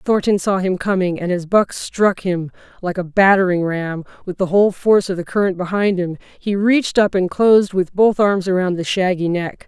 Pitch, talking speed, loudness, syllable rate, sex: 190 Hz, 210 wpm, -17 LUFS, 5.1 syllables/s, female